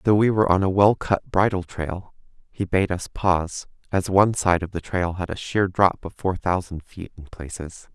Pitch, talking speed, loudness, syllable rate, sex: 90 Hz, 220 wpm, -22 LUFS, 4.9 syllables/s, male